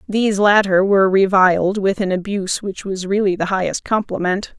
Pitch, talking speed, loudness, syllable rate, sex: 195 Hz, 170 wpm, -17 LUFS, 5.4 syllables/s, female